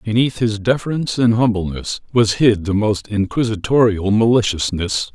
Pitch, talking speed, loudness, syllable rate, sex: 110 Hz, 130 wpm, -17 LUFS, 4.9 syllables/s, male